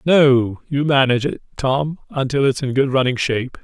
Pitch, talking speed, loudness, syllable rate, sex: 135 Hz, 180 wpm, -18 LUFS, 5.1 syllables/s, male